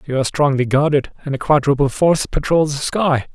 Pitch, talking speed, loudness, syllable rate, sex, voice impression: 145 Hz, 200 wpm, -17 LUFS, 6.0 syllables/s, male, masculine, middle-aged, slightly thick, slightly muffled, slightly fluent, sincere, slightly calm, friendly